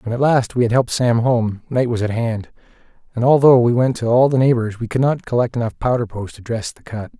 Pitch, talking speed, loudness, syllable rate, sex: 120 Hz, 260 wpm, -17 LUFS, 5.8 syllables/s, male